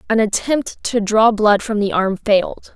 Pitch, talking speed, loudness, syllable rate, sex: 215 Hz, 195 wpm, -17 LUFS, 4.3 syllables/s, female